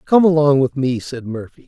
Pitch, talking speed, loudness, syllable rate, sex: 140 Hz, 215 wpm, -16 LUFS, 5.2 syllables/s, male